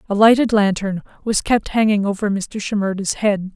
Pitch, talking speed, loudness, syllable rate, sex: 205 Hz, 170 wpm, -18 LUFS, 5.1 syllables/s, female